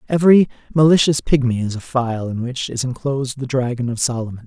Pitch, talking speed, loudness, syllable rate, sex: 130 Hz, 190 wpm, -18 LUFS, 6.0 syllables/s, male